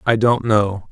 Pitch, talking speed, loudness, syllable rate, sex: 110 Hz, 200 wpm, -17 LUFS, 3.8 syllables/s, male